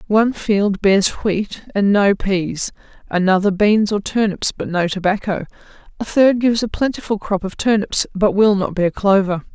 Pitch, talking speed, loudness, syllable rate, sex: 200 Hz, 170 wpm, -17 LUFS, 4.6 syllables/s, female